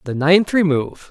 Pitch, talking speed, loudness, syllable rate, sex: 165 Hz, 165 wpm, -16 LUFS, 5.2 syllables/s, male